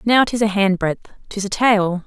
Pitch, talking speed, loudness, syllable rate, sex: 205 Hz, 205 wpm, -18 LUFS, 4.5 syllables/s, female